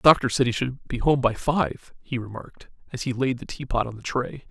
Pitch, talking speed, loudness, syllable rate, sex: 125 Hz, 265 wpm, -25 LUFS, 5.6 syllables/s, male